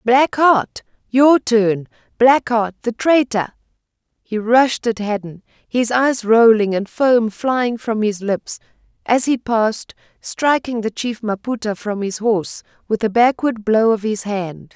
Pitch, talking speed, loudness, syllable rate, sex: 225 Hz, 155 wpm, -17 LUFS, 3.9 syllables/s, female